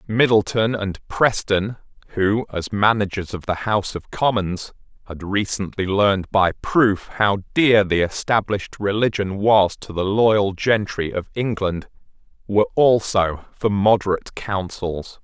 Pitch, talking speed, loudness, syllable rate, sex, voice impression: 100 Hz, 130 wpm, -20 LUFS, 4.1 syllables/s, male, masculine, adult-like, slightly halting, intellectual, refreshing